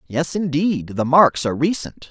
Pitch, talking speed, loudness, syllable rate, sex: 150 Hz, 170 wpm, -19 LUFS, 4.6 syllables/s, male